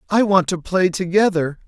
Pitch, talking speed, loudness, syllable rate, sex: 180 Hz, 180 wpm, -18 LUFS, 4.9 syllables/s, male